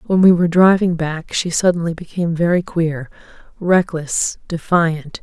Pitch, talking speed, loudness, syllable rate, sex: 170 Hz, 125 wpm, -17 LUFS, 4.7 syllables/s, female